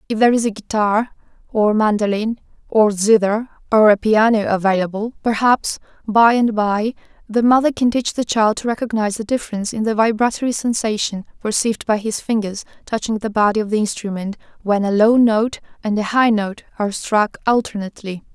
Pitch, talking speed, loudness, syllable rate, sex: 215 Hz, 170 wpm, -18 LUFS, 5.5 syllables/s, female